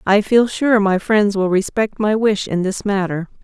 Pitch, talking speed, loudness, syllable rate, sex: 205 Hz, 210 wpm, -17 LUFS, 4.4 syllables/s, female